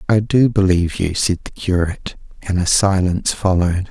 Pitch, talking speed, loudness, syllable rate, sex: 95 Hz, 170 wpm, -17 LUFS, 5.5 syllables/s, male